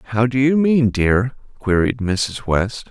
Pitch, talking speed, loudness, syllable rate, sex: 120 Hz, 165 wpm, -18 LUFS, 3.8 syllables/s, male